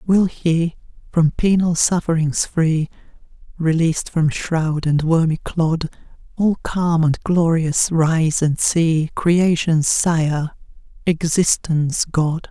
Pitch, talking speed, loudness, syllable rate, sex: 165 Hz, 105 wpm, -18 LUFS, 3.3 syllables/s, female